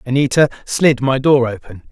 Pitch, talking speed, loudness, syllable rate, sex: 130 Hz, 155 wpm, -15 LUFS, 4.9 syllables/s, male